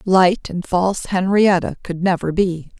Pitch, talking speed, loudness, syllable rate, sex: 180 Hz, 150 wpm, -18 LUFS, 4.2 syllables/s, female